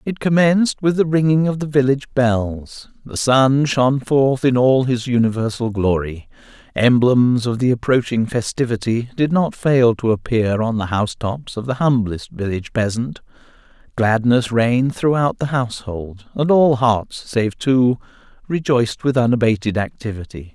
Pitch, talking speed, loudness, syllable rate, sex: 125 Hz, 145 wpm, -18 LUFS, 4.7 syllables/s, male